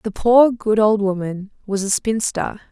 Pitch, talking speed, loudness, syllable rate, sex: 210 Hz, 175 wpm, -18 LUFS, 4.2 syllables/s, female